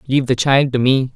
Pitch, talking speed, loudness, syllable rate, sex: 130 Hz, 260 wpm, -15 LUFS, 6.1 syllables/s, male